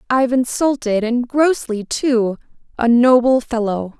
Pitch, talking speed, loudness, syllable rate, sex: 240 Hz, 90 wpm, -17 LUFS, 4.2 syllables/s, female